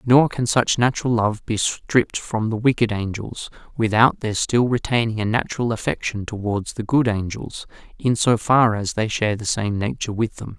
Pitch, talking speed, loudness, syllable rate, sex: 115 Hz, 185 wpm, -21 LUFS, 5.1 syllables/s, male